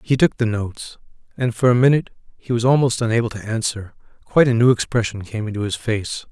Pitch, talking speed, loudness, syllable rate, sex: 115 Hz, 210 wpm, -19 LUFS, 6.3 syllables/s, male